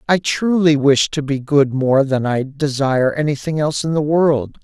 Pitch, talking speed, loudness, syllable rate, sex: 145 Hz, 195 wpm, -17 LUFS, 4.7 syllables/s, male